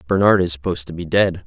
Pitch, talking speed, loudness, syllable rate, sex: 90 Hz, 245 wpm, -18 LUFS, 6.9 syllables/s, male